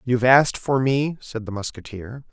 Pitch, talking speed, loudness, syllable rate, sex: 120 Hz, 205 wpm, -21 LUFS, 5.1 syllables/s, male